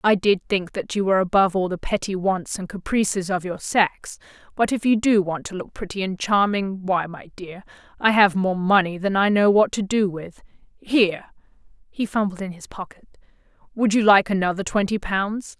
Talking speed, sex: 220 wpm, female